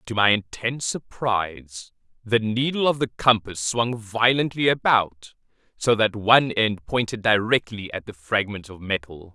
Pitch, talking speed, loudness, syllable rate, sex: 110 Hz, 150 wpm, -22 LUFS, 4.5 syllables/s, male